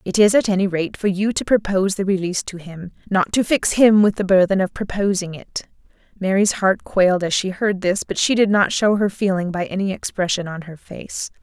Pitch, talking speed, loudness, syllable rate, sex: 195 Hz, 220 wpm, -19 LUFS, 5.5 syllables/s, female